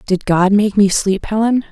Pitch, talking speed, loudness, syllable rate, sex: 205 Hz, 210 wpm, -14 LUFS, 4.6 syllables/s, female